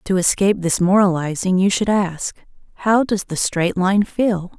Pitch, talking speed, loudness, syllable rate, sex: 190 Hz, 170 wpm, -18 LUFS, 4.6 syllables/s, female